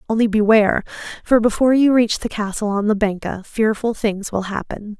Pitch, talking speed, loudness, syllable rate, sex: 215 Hz, 180 wpm, -18 LUFS, 5.5 syllables/s, female